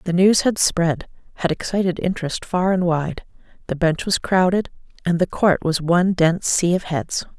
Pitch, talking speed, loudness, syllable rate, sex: 175 Hz, 180 wpm, -20 LUFS, 5.0 syllables/s, female